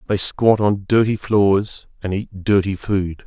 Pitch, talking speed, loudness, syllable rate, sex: 100 Hz, 165 wpm, -18 LUFS, 3.8 syllables/s, male